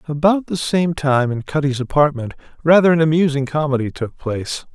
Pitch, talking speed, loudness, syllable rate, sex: 150 Hz, 165 wpm, -18 LUFS, 5.4 syllables/s, male